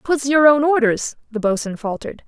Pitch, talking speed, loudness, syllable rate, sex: 255 Hz, 185 wpm, -18 LUFS, 5.4 syllables/s, female